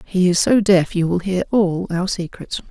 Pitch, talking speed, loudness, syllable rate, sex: 185 Hz, 220 wpm, -18 LUFS, 4.5 syllables/s, female